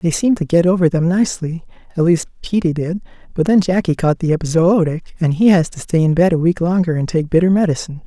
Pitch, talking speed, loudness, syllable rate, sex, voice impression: 170 Hz, 230 wpm, -16 LUFS, 6.2 syllables/s, male, masculine, slightly gender-neutral, slightly young, slightly adult-like, slightly thick, slightly tensed, weak, bright, slightly hard, clear, slightly fluent, cool, intellectual, very refreshing, very sincere, calm, friendly, reassuring, slightly unique, elegant, slightly wild, slightly sweet, slightly lively, kind, very modest